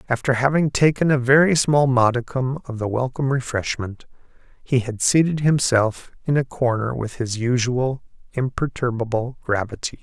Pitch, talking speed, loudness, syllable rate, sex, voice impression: 125 Hz, 140 wpm, -20 LUFS, 4.9 syllables/s, male, masculine, adult-like, slightly powerful, slightly hard, clear, slightly raspy, cool, calm, friendly, wild, slightly lively, modest